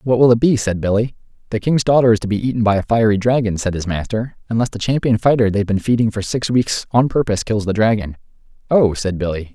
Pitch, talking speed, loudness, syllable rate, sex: 110 Hz, 240 wpm, -17 LUFS, 6.3 syllables/s, male